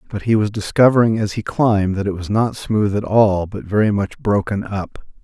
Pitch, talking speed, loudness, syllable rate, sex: 105 Hz, 220 wpm, -18 LUFS, 5.2 syllables/s, male